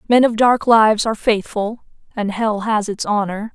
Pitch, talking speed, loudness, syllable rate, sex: 215 Hz, 185 wpm, -17 LUFS, 4.9 syllables/s, female